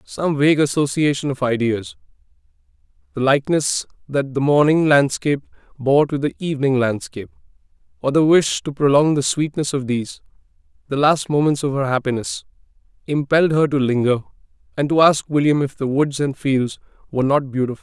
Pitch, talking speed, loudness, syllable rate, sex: 140 Hz, 155 wpm, -19 LUFS, 5.6 syllables/s, male